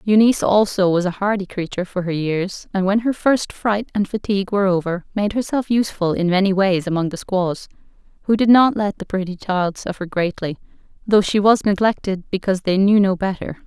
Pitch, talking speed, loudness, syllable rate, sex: 195 Hz, 200 wpm, -19 LUFS, 5.6 syllables/s, female